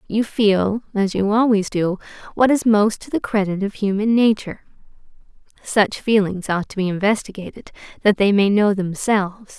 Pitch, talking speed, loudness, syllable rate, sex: 205 Hz, 165 wpm, -19 LUFS, 4.9 syllables/s, female